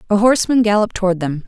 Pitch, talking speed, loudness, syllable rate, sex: 205 Hz, 205 wpm, -16 LUFS, 7.9 syllables/s, female